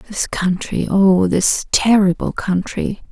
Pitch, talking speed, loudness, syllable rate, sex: 190 Hz, 115 wpm, -16 LUFS, 3.6 syllables/s, female